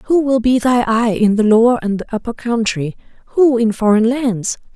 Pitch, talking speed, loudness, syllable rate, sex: 230 Hz, 200 wpm, -15 LUFS, 4.9 syllables/s, female